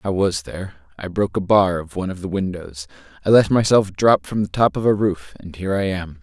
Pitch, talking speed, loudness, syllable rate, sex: 95 Hz, 250 wpm, -19 LUFS, 5.8 syllables/s, male